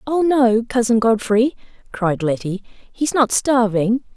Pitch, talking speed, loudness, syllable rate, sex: 235 Hz, 145 wpm, -18 LUFS, 4.1 syllables/s, female